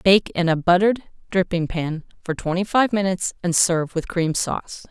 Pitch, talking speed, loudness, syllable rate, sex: 180 Hz, 185 wpm, -21 LUFS, 5.4 syllables/s, female